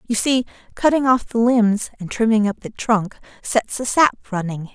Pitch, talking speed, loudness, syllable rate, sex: 225 Hz, 190 wpm, -19 LUFS, 4.7 syllables/s, female